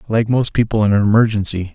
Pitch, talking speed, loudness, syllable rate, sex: 110 Hz, 205 wpm, -16 LUFS, 6.3 syllables/s, male